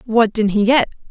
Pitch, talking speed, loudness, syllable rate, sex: 225 Hz, 215 wpm, -16 LUFS, 5.1 syllables/s, female